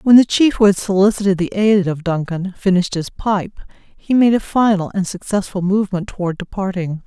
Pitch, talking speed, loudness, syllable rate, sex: 195 Hz, 185 wpm, -17 LUFS, 5.4 syllables/s, female